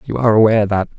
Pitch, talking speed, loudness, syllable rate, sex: 110 Hz, 245 wpm, -14 LUFS, 8.6 syllables/s, male